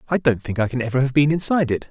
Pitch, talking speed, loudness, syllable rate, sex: 135 Hz, 315 wpm, -20 LUFS, 7.5 syllables/s, male